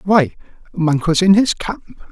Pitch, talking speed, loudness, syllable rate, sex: 175 Hz, 170 wpm, -16 LUFS, 3.7 syllables/s, male